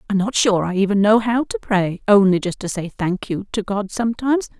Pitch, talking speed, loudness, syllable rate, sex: 205 Hz, 235 wpm, -19 LUFS, 5.6 syllables/s, female